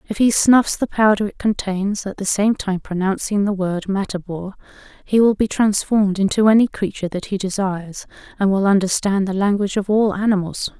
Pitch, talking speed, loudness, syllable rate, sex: 200 Hz, 185 wpm, -18 LUFS, 5.4 syllables/s, female